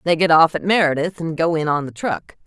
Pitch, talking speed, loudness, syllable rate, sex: 160 Hz, 270 wpm, -18 LUFS, 5.7 syllables/s, female